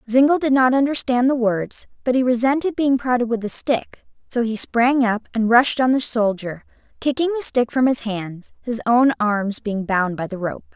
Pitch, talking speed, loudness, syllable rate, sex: 240 Hz, 205 wpm, -19 LUFS, 4.9 syllables/s, female